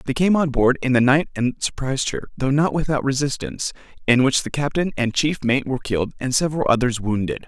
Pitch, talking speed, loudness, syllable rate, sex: 135 Hz, 215 wpm, -21 LUFS, 6.0 syllables/s, male